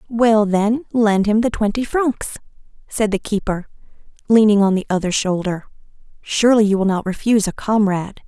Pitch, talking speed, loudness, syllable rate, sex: 210 Hz, 160 wpm, -17 LUFS, 5.2 syllables/s, female